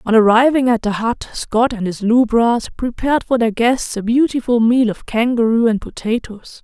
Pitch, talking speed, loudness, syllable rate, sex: 235 Hz, 180 wpm, -16 LUFS, 4.9 syllables/s, female